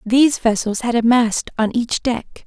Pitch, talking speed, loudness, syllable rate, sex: 235 Hz, 195 wpm, -18 LUFS, 4.4 syllables/s, female